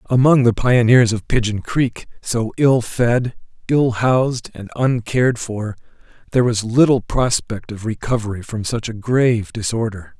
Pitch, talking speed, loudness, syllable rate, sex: 115 Hz, 145 wpm, -18 LUFS, 4.5 syllables/s, male